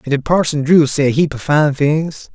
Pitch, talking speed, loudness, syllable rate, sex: 150 Hz, 255 wpm, -14 LUFS, 5.4 syllables/s, male